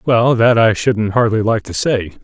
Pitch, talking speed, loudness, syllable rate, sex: 115 Hz, 215 wpm, -14 LUFS, 4.4 syllables/s, male